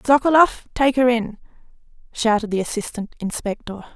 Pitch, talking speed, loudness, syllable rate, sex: 235 Hz, 120 wpm, -20 LUFS, 5.3 syllables/s, female